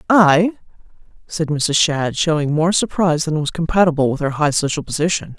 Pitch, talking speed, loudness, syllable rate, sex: 160 Hz, 165 wpm, -17 LUFS, 5.4 syllables/s, female